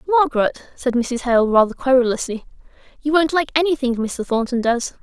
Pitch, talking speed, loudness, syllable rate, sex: 260 Hz, 155 wpm, -19 LUFS, 5.3 syllables/s, female